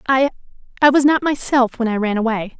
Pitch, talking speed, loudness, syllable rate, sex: 250 Hz, 185 wpm, -17 LUFS, 5.8 syllables/s, female